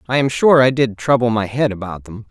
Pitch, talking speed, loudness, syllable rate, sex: 120 Hz, 260 wpm, -16 LUFS, 5.7 syllables/s, male